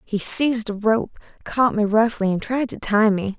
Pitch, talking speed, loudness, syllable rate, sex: 220 Hz, 215 wpm, -20 LUFS, 4.7 syllables/s, female